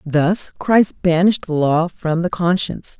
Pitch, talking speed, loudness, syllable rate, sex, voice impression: 175 Hz, 160 wpm, -17 LUFS, 4.2 syllables/s, female, feminine, adult-like, tensed, powerful, bright, slightly soft, clear, intellectual, calm, friendly, reassuring, elegant, lively, kind, slightly modest